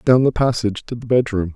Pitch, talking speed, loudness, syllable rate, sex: 115 Hz, 230 wpm, -19 LUFS, 6.3 syllables/s, male